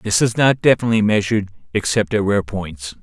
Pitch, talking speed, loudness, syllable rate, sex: 105 Hz, 180 wpm, -18 LUFS, 5.9 syllables/s, male